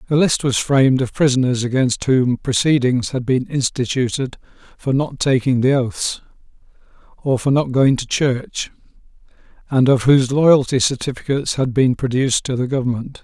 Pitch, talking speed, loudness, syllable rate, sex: 130 Hz, 155 wpm, -17 LUFS, 5.1 syllables/s, male